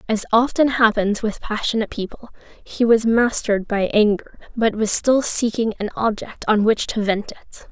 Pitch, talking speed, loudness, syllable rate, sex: 220 Hz, 170 wpm, -19 LUFS, 4.9 syllables/s, female